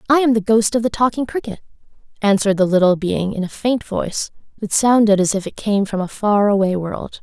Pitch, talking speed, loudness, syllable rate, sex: 210 Hz, 225 wpm, -17 LUFS, 5.7 syllables/s, female